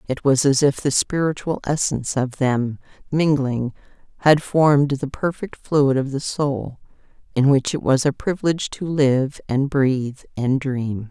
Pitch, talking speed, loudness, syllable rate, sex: 140 Hz, 160 wpm, -20 LUFS, 4.4 syllables/s, female